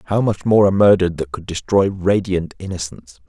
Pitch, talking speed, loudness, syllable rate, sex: 95 Hz, 185 wpm, -17 LUFS, 5.7 syllables/s, male